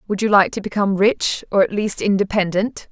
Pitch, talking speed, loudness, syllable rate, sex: 200 Hz, 205 wpm, -18 LUFS, 5.6 syllables/s, female